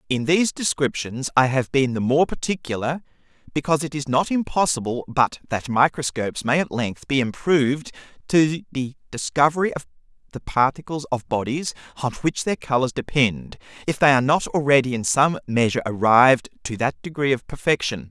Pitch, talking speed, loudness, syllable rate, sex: 135 Hz, 160 wpm, -21 LUFS, 5.4 syllables/s, male